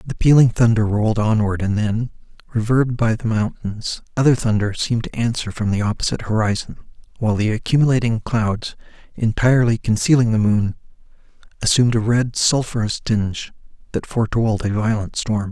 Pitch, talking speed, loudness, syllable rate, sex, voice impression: 110 Hz, 145 wpm, -19 LUFS, 5.6 syllables/s, male, masculine, adult-like, slightly muffled, calm, slightly reassuring, sweet